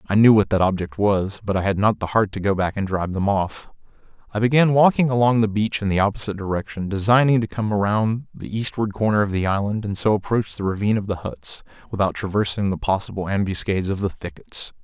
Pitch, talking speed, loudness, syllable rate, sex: 100 Hz, 225 wpm, -21 LUFS, 6.0 syllables/s, male